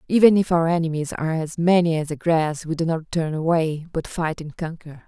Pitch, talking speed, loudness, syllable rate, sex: 165 Hz, 225 wpm, -22 LUFS, 5.4 syllables/s, female